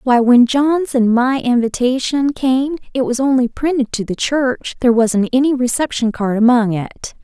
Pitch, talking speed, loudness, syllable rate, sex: 250 Hz, 165 wpm, -15 LUFS, 4.5 syllables/s, female